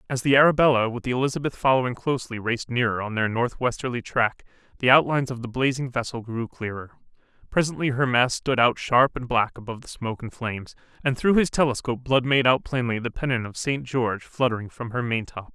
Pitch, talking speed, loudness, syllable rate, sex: 125 Hz, 205 wpm, -23 LUFS, 6.2 syllables/s, male